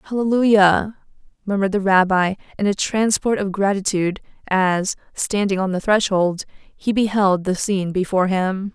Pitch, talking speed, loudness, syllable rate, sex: 195 Hz, 135 wpm, -19 LUFS, 4.8 syllables/s, female